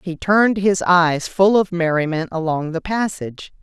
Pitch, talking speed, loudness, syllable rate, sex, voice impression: 175 Hz, 165 wpm, -18 LUFS, 4.6 syllables/s, female, feminine, gender-neutral, adult-like, slightly middle-aged, slightly thin, tensed, slightly powerful, bright, hard, clear, fluent, slightly raspy, cool, slightly intellectual, refreshing, calm, slightly friendly, reassuring, very unique, slightly elegant, slightly wild, slightly sweet, slightly lively, strict